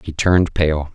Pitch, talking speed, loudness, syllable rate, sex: 80 Hz, 190 wpm, -17 LUFS, 4.7 syllables/s, male